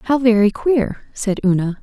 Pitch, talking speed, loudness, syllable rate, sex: 220 Hz, 165 wpm, -17 LUFS, 4.1 syllables/s, female